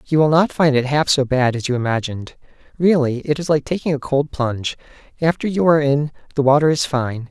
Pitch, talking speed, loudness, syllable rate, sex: 140 Hz, 220 wpm, -18 LUFS, 5.9 syllables/s, male